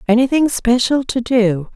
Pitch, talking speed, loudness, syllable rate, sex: 240 Hz, 135 wpm, -15 LUFS, 4.5 syllables/s, female